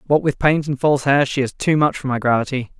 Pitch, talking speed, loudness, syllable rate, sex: 140 Hz, 280 wpm, -18 LUFS, 6.2 syllables/s, male